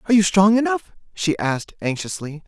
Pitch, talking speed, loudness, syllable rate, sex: 185 Hz, 170 wpm, -20 LUFS, 5.9 syllables/s, male